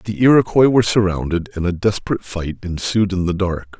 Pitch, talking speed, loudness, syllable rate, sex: 95 Hz, 190 wpm, -18 LUFS, 5.8 syllables/s, male